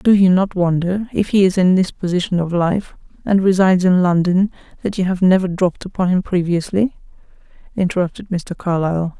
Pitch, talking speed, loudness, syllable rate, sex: 185 Hz, 175 wpm, -17 LUFS, 5.6 syllables/s, female